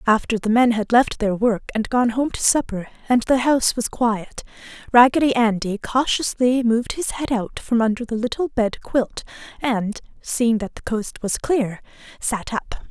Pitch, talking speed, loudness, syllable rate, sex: 235 Hz, 180 wpm, -20 LUFS, 4.6 syllables/s, female